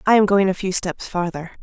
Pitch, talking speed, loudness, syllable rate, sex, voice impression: 190 Hz, 260 wpm, -20 LUFS, 5.8 syllables/s, female, very feminine, slightly young, slightly adult-like, very thin, tensed, slightly powerful, bright, hard, very clear, fluent, cute, slightly cool, intellectual, very refreshing, sincere, slightly calm, friendly, slightly reassuring, slightly unique, wild, very lively, strict, intense